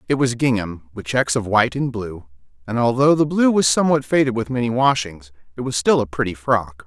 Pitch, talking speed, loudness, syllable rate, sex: 115 Hz, 220 wpm, -19 LUFS, 5.6 syllables/s, male